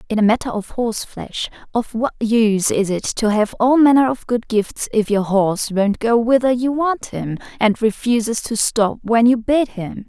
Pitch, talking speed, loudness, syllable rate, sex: 225 Hz, 200 wpm, -18 LUFS, 4.6 syllables/s, female